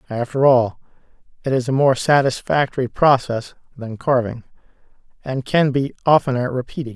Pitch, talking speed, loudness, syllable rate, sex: 130 Hz, 130 wpm, -19 LUFS, 5.1 syllables/s, male